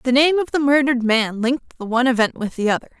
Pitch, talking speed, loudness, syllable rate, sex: 255 Hz, 260 wpm, -18 LUFS, 6.6 syllables/s, female